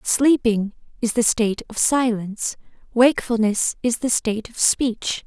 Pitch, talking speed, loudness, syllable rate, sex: 230 Hz, 135 wpm, -20 LUFS, 4.5 syllables/s, female